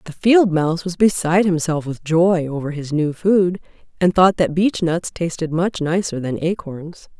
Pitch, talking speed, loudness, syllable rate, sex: 170 Hz, 185 wpm, -18 LUFS, 4.6 syllables/s, female